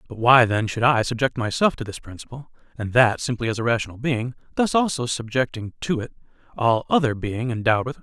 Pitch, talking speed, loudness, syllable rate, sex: 120 Hz, 210 wpm, -22 LUFS, 6.1 syllables/s, male